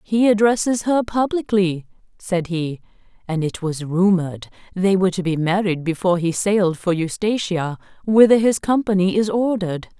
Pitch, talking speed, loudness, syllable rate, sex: 190 Hz, 150 wpm, -19 LUFS, 5.1 syllables/s, female